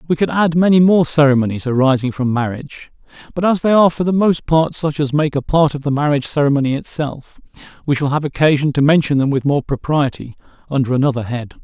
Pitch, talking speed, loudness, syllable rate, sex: 145 Hz, 205 wpm, -16 LUFS, 6.2 syllables/s, male